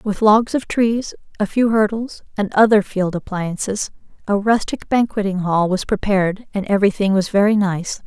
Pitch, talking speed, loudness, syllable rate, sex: 205 Hz, 165 wpm, -18 LUFS, 4.9 syllables/s, female